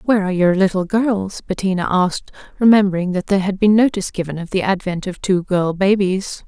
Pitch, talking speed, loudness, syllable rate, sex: 190 Hz, 195 wpm, -17 LUFS, 6.0 syllables/s, female